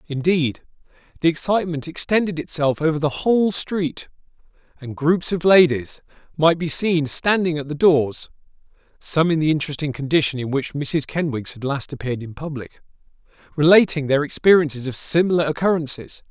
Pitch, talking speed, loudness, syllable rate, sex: 155 Hz, 145 wpm, -20 LUFS, 3.9 syllables/s, male